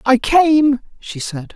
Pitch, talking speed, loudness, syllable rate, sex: 260 Hz, 155 wpm, -15 LUFS, 3.2 syllables/s, male